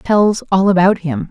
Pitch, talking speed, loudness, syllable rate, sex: 190 Hz, 185 wpm, -14 LUFS, 4.2 syllables/s, female